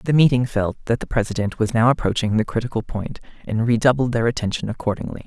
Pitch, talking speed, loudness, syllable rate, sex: 115 Hz, 195 wpm, -21 LUFS, 6.4 syllables/s, male